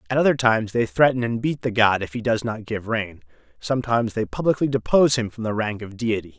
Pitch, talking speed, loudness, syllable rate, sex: 115 Hz, 235 wpm, -22 LUFS, 6.2 syllables/s, male